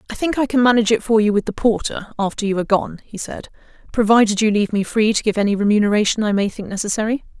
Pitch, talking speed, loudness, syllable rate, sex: 215 Hz, 245 wpm, -18 LUFS, 7.1 syllables/s, female